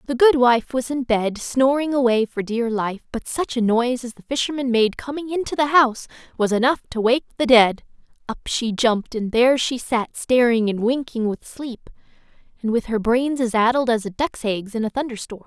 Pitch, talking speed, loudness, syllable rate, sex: 240 Hz, 215 wpm, -20 LUFS, 5.2 syllables/s, female